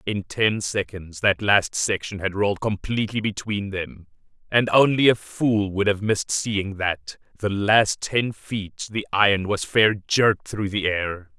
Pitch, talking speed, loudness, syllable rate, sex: 100 Hz, 170 wpm, -22 LUFS, 4.1 syllables/s, male